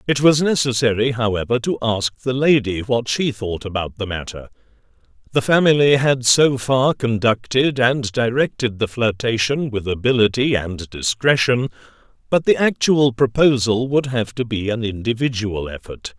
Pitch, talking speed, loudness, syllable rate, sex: 120 Hz, 145 wpm, -18 LUFS, 4.6 syllables/s, male